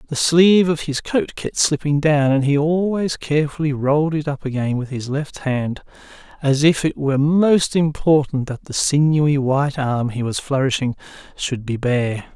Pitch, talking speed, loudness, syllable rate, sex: 145 Hz, 180 wpm, -19 LUFS, 4.8 syllables/s, male